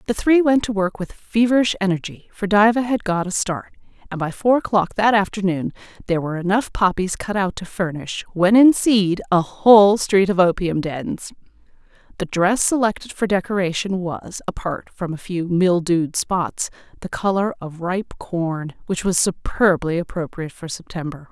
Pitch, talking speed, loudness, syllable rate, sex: 190 Hz, 170 wpm, -19 LUFS, 4.8 syllables/s, female